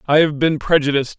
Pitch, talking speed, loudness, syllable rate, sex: 150 Hz, 205 wpm, -17 LUFS, 6.8 syllables/s, male